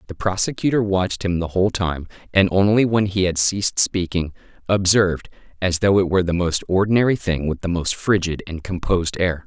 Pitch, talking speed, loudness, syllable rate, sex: 95 Hz, 190 wpm, -20 LUFS, 5.7 syllables/s, male